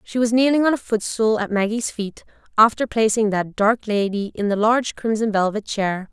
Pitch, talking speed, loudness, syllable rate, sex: 215 Hz, 195 wpm, -20 LUFS, 5.1 syllables/s, female